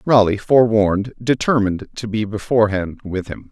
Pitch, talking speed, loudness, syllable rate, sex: 110 Hz, 135 wpm, -18 LUFS, 5.5 syllables/s, male